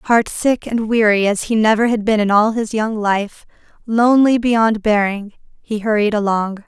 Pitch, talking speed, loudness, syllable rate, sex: 215 Hz, 170 wpm, -16 LUFS, 4.5 syllables/s, female